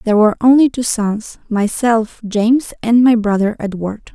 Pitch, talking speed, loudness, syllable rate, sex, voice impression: 225 Hz, 160 wpm, -15 LUFS, 4.8 syllables/s, female, very feminine, slightly young, very thin, slightly tensed, weak, slightly dark, soft, slightly muffled, fluent, slightly raspy, cute, intellectual, very refreshing, sincere, calm, very friendly, reassuring, unique, very elegant, slightly wild, sweet, slightly lively, kind, modest, light